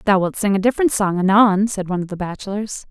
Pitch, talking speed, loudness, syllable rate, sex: 200 Hz, 250 wpm, -18 LUFS, 6.6 syllables/s, female